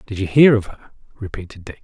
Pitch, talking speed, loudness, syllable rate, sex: 105 Hz, 230 wpm, -15 LUFS, 6.5 syllables/s, male